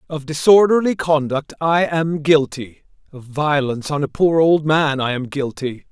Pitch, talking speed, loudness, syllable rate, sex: 150 Hz, 160 wpm, -17 LUFS, 4.5 syllables/s, male